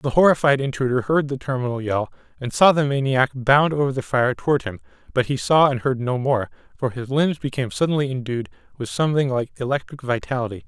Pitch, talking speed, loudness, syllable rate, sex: 130 Hz, 195 wpm, -21 LUFS, 5.9 syllables/s, male